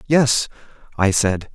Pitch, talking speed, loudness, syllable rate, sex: 115 Hz, 115 wpm, -18 LUFS, 3.3 syllables/s, male